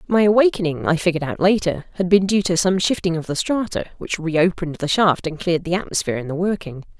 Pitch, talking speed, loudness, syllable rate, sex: 175 Hz, 225 wpm, -20 LUFS, 6.3 syllables/s, female